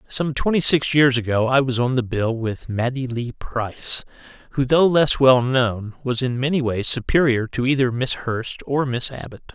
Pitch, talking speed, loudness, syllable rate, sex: 125 Hz, 195 wpm, -20 LUFS, 4.6 syllables/s, male